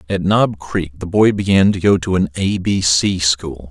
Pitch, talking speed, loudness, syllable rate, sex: 90 Hz, 225 wpm, -16 LUFS, 4.4 syllables/s, male